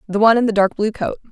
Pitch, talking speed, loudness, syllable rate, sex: 215 Hz, 320 wpm, -17 LUFS, 7.7 syllables/s, female